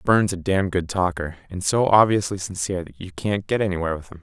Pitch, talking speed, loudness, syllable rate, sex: 95 Hz, 225 wpm, -22 LUFS, 6.3 syllables/s, male